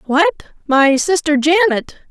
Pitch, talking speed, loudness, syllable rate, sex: 305 Hz, 115 wpm, -14 LUFS, 3.6 syllables/s, female